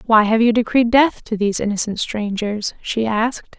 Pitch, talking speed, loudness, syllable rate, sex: 220 Hz, 185 wpm, -18 LUFS, 5.0 syllables/s, female